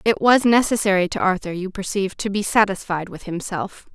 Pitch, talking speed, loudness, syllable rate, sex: 195 Hz, 180 wpm, -20 LUFS, 5.5 syllables/s, female